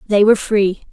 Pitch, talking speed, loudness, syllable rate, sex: 205 Hz, 195 wpm, -15 LUFS, 5.3 syllables/s, female